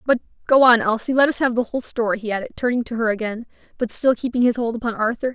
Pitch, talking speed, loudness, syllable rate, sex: 235 Hz, 260 wpm, -20 LUFS, 6.9 syllables/s, female